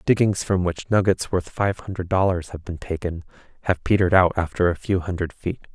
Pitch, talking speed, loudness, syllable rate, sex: 90 Hz, 200 wpm, -22 LUFS, 5.5 syllables/s, male